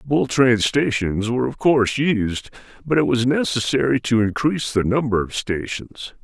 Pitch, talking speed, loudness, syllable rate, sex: 125 Hz, 175 wpm, -20 LUFS, 5.0 syllables/s, male